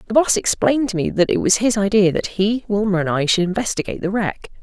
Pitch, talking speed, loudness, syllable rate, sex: 205 Hz, 245 wpm, -18 LUFS, 6.2 syllables/s, female